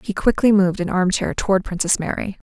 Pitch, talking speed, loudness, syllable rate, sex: 190 Hz, 195 wpm, -19 LUFS, 6.1 syllables/s, female